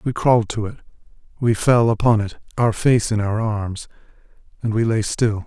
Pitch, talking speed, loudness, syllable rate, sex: 110 Hz, 185 wpm, -19 LUFS, 5.0 syllables/s, male